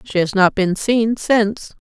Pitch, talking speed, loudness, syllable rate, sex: 205 Hz, 195 wpm, -17 LUFS, 4.1 syllables/s, female